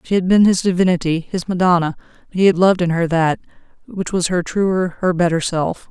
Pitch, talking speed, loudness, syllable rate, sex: 180 Hz, 205 wpm, -17 LUFS, 5.4 syllables/s, female